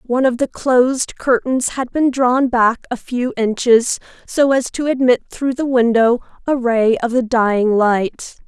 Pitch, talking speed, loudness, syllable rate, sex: 245 Hz, 175 wpm, -16 LUFS, 4.1 syllables/s, female